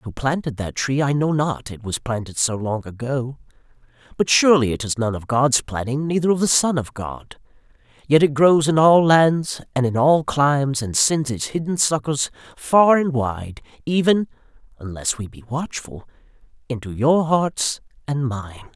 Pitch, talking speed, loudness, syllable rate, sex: 135 Hz, 175 wpm, -19 LUFS, 4.3 syllables/s, male